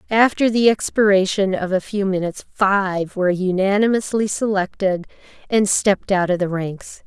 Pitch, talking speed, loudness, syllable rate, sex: 195 Hz, 145 wpm, -19 LUFS, 4.9 syllables/s, female